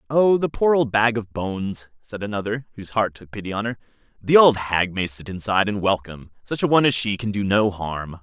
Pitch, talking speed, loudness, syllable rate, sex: 110 Hz, 235 wpm, -21 LUFS, 5.7 syllables/s, male